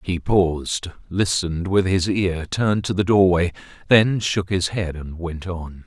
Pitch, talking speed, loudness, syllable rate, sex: 90 Hz, 175 wpm, -21 LUFS, 4.3 syllables/s, male